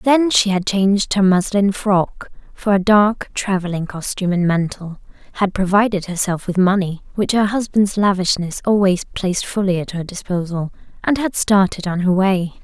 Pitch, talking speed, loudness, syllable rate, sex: 190 Hz, 155 wpm, -18 LUFS, 4.9 syllables/s, female